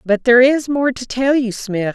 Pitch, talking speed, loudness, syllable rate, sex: 245 Hz, 245 wpm, -15 LUFS, 4.7 syllables/s, female